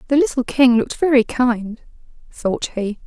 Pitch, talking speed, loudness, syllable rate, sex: 250 Hz, 155 wpm, -18 LUFS, 4.6 syllables/s, female